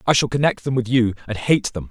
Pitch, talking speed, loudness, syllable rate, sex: 120 Hz, 285 wpm, -20 LUFS, 6.1 syllables/s, male